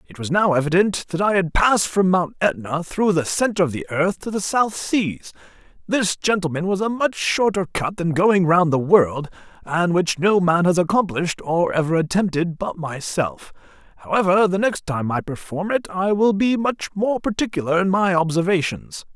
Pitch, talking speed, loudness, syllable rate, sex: 180 Hz, 190 wpm, -20 LUFS, 4.9 syllables/s, male